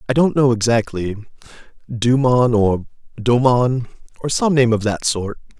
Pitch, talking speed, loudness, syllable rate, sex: 120 Hz, 140 wpm, -17 LUFS, 4.4 syllables/s, male